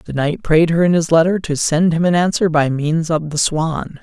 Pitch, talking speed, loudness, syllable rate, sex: 160 Hz, 255 wpm, -16 LUFS, 4.9 syllables/s, male